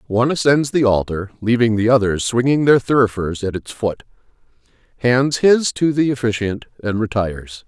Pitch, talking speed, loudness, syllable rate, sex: 115 Hz, 150 wpm, -17 LUFS, 5.1 syllables/s, male